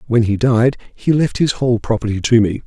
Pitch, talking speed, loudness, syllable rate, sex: 120 Hz, 225 wpm, -16 LUFS, 5.5 syllables/s, male